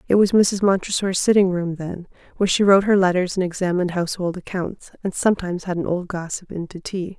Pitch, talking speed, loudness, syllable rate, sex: 185 Hz, 210 wpm, -21 LUFS, 6.2 syllables/s, female